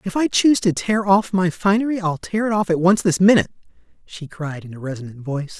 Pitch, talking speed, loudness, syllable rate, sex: 185 Hz, 235 wpm, -19 LUFS, 6.1 syllables/s, male